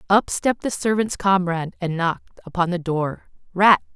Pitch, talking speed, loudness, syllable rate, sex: 185 Hz, 150 wpm, -21 LUFS, 5.4 syllables/s, female